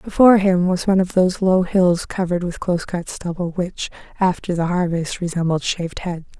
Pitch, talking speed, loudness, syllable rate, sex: 180 Hz, 190 wpm, -19 LUFS, 5.6 syllables/s, female